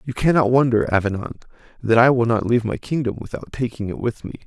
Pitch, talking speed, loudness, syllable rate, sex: 120 Hz, 215 wpm, -20 LUFS, 6.3 syllables/s, male